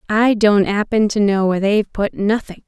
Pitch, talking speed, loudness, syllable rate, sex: 205 Hz, 200 wpm, -16 LUFS, 5.2 syllables/s, female